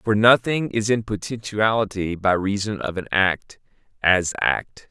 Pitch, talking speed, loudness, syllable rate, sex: 105 Hz, 145 wpm, -21 LUFS, 4.1 syllables/s, male